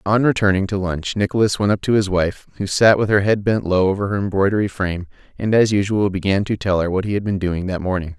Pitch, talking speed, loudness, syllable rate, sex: 100 Hz, 255 wpm, -19 LUFS, 6.2 syllables/s, male